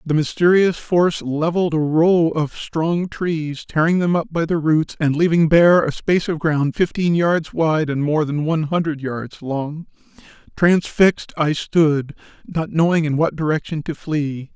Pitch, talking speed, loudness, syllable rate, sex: 160 Hz, 175 wpm, -19 LUFS, 4.3 syllables/s, male